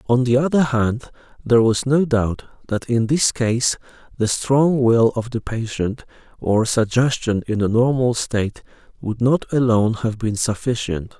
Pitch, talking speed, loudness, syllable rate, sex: 120 Hz, 160 wpm, -19 LUFS, 4.4 syllables/s, male